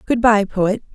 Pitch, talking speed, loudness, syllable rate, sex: 210 Hz, 190 wpm, -17 LUFS, 4.2 syllables/s, female